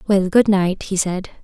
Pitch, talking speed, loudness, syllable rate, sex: 190 Hz, 210 wpm, -18 LUFS, 4.4 syllables/s, female